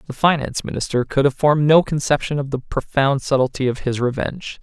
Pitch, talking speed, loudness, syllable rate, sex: 140 Hz, 195 wpm, -19 LUFS, 6.0 syllables/s, male